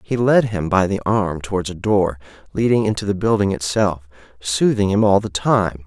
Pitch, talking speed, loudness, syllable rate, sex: 100 Hz, 195 wpm, -18 LUFS, 4.9 syllables/s, male